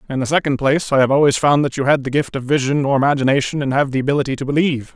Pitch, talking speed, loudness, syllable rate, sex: 140 Hz, 280 wpm, -17 LUFS, 7.5 syllables/s, male